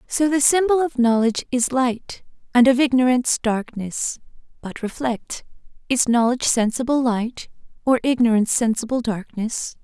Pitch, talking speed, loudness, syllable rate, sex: 245 Hz, 130 wpm, -20 LUFS, 4.9 syllables/s, female